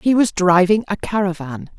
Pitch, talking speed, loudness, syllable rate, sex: 190 Hz, 170 wpm, -17 LUFS, 4.9 syllables/s, female